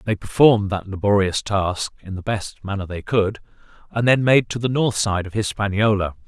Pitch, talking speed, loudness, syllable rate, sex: 105 Hz, 190 wpm, -20 LUFS, 5.1 syllables/s, male